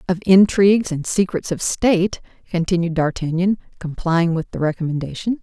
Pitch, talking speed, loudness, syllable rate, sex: 175 Hz, 135 wpm, -19 LUFS, 5.3 syllables/s, female